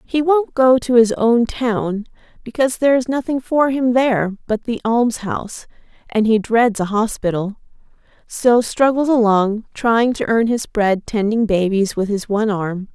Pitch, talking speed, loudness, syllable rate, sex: 230 Hz, 165 wpm, -17 LUFS, 4.5 syllables/s, female